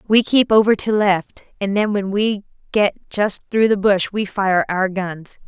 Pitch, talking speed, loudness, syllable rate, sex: 200 Hz, 195 wpm, -18 LUFS, 4.1 syllables/s, female